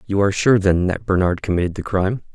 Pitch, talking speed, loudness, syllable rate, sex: 100 Hz, 230 wpm, -19 LUFS, 6.5 syllables/s, male